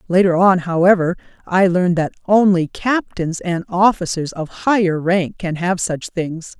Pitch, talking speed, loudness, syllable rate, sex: 180 Hz, 155 wpm, -17 LUFS, 4.4 syllables/s, female